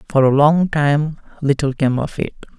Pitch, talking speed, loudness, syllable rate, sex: 145 Hz, 185 wpm, -17 LUFS, 4.6 syllables/s, male